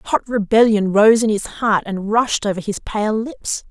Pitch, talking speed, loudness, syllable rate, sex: 215 Hz, 195 wpm, -17 LUFS, 4.2 syllables/s, female